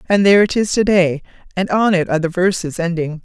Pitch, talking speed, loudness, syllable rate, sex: 180 Hz, 240 wpm, -16 LUFS, 6.1 syllables/s, female